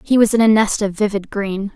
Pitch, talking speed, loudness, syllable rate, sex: 205 Hz, 275 wpm, -16 LUFS, 5.5 syllables/s, female